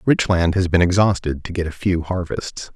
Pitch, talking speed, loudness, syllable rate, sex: 90 Hz, 220 wpm, -19 LUFS, 4.9 syllables/s, male